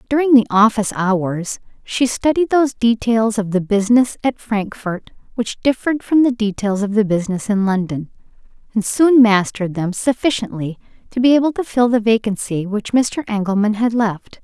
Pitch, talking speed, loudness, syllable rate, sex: 220 Hz, 165 wpm, -17 LUFS, 5.1 syllables/s, female